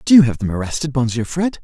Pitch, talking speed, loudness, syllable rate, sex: 135 Hz, 255 wpm, -18 LUFS, 6.6 syllables/s, male